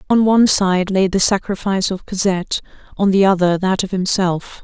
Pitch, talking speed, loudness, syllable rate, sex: 190 Hz, 180 wpm, -16 LUFS, 5.4 syllables/s, female